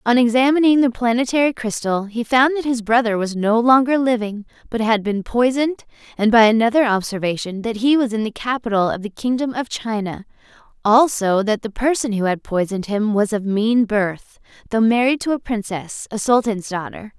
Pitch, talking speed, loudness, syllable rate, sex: 230 Hz, 185 wpm, -18 LUFS, 5.3 syllables/s, female